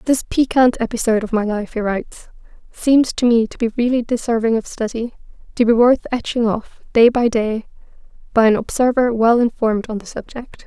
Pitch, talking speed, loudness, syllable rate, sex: 230 Hz, 185 wpm, -17 LUFS, 5.4 syllables/s, female